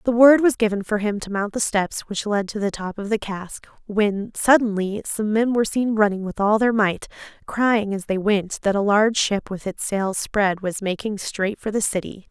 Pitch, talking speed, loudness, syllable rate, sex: 210 Hz, 230 wpm, -21 LUFS, 4.8 syllables/s, female